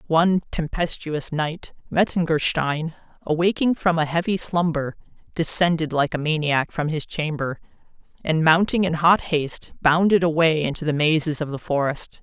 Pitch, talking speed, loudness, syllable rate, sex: 160 Hz, 140 wpm, -21 LUFS, 4.8 syllables/s, female